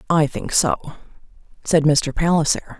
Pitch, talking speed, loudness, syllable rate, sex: 155 Hz, 130 wpm, -19 LUFS, 4.6 syllables/s, female